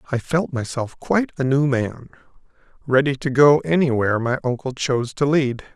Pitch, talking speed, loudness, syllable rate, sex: 135 Hz, 165 wpm, -20 LUFS, 5.2 syllables/s, male